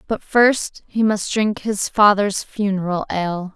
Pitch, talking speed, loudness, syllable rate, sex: 200 Hz, 150 wpm, -19 LUFS, 3.9 syllables/s, female